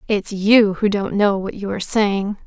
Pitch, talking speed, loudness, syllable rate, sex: 200 Hz, 220 wpm, -18 LUFS, 4.4 syllables/s, female